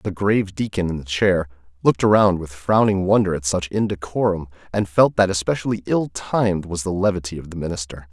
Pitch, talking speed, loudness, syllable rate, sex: 95 Hz, 190 wpm, -20 LUFS, 5.8 syllables/s, male